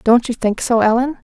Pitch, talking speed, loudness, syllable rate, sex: 240 Hz, 225 wpm, -16 LUFS, 5.4 syllables/s, female